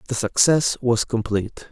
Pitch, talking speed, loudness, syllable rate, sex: 115 Hz, 140 wpm, -20 LUFS, 4.8 syllables/s, male